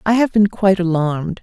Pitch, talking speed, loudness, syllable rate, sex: 190 Hz, 210 wpm, -16 LUFS, 6.1 syllables/s, female